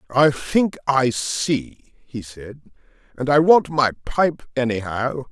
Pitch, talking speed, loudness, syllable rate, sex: 130 Hz, 135 wpm, -20 LUFS, 3.5 syllables/s, male